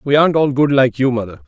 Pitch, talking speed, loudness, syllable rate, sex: 135 Hz, 285 wpm, -15 LUFS, 6.6 syllables/s, male